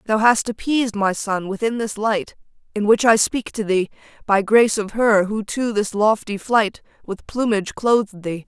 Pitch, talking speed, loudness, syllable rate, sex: 215 Hz, 190 wpm, -19 LUFS, 4.8 syllables/s, female